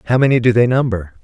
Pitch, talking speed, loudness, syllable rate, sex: 120 Hz, 245 wpm, -14 LUFS, 7.1 syllables/s, male